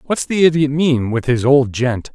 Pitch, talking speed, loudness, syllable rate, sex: 135 Hz, 195 wpm, -15 LUFS, 4.4 syllables/s, male